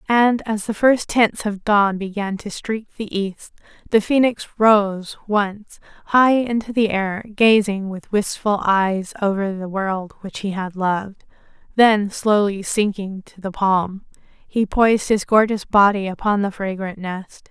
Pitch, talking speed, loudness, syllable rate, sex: 205 Hz, 160 wpm, -19 LUFS, 4.0 syllables/s, female